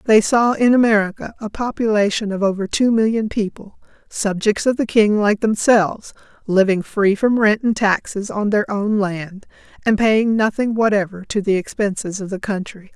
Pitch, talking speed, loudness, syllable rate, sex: 210 Hz, 170 wpm, -18 LUFS, 4.9 syllables/s, female